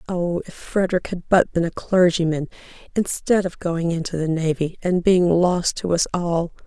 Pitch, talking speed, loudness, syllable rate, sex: 175 Hz, 180 wpm, -21 LUFS, 4.7 syllables/s, female